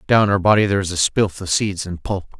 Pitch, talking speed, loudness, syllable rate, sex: 95 Hz, 275 wpm, -18 LUFS, 5.8 syllables/s, male